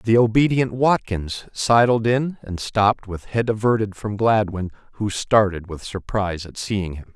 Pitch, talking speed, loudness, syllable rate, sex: 105 Hz, 160 wpm, -21 LUFS, 4.4 syllables/s, male